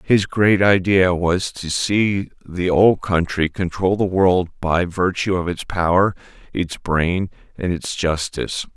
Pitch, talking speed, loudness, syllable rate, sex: 90 Hz, 150 wpm, -19 LUFS, 3.8 syllables/s, male